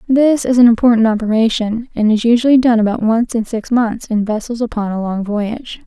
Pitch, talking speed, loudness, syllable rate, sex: 230 Hz, 205 wpm, -14 LUFS, 5.5 syllables/s, female